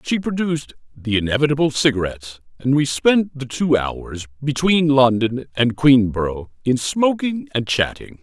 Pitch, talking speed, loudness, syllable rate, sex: 135 Hz, 140 wpm, -19 LUFS, 4.6 syllables/s, male